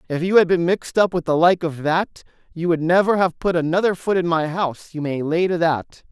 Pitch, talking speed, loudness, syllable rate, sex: 170 Hz, 255 wpm, -19 LUFS, 5.6 syllables/s, male